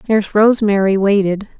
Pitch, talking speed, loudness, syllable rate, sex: 205 Hz, 115 wpm, -14 LUFS, 6.0 syllables/s, female